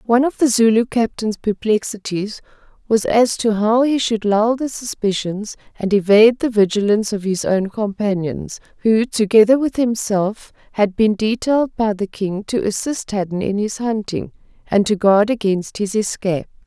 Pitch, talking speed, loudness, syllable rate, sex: 215 Hz, 160 wpm, -18 LUFS, 4.8 syllables/s, female